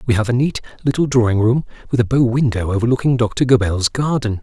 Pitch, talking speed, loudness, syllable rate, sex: 120 Hz, 205 wpm, -17 LUFS, 6.1 syllables/s, male